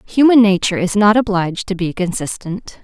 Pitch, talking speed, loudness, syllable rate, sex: 200 Hz, 170 wpm, -15 LUFS, 5.6 syllables/s, female